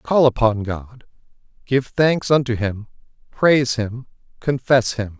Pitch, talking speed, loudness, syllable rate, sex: 120 Hz, 125 wpm, -19 LUFS, 3.9 syllables/s, male